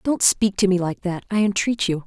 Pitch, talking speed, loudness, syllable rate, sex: 195 Hz, 260 wpm, -21 LUFS, 5.2 syllables/s, female